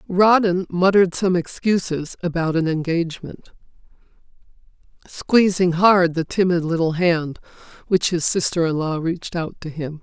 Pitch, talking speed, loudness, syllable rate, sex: 175 Hz, 130 wpm, -19 LUFS, 4.7 syllables/s, female